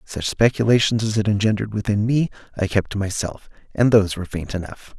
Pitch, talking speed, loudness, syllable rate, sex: 105 Hz, 190 wpm, -20 LUFS, 6.2 syllables/s, male